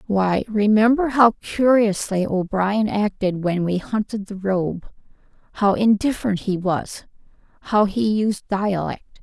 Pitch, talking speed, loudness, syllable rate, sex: 205 Hz, 110 wpm, -20 LUFS, 4.0 syllables/s, female